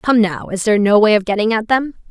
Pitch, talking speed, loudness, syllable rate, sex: 215 Hz, 285 wpm, -15 LUFS, 6.1 syllables/s, female